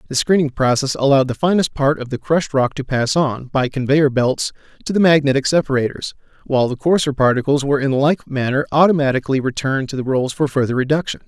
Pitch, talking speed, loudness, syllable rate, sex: 140 Hz, 195 wpm, -17 LUFS, 6.3 syllables/s, male